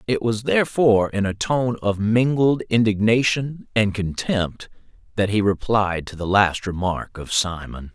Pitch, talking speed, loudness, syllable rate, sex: 105 Hz, 150 wpm, -21 LUFS, 4.3 syllables/s, male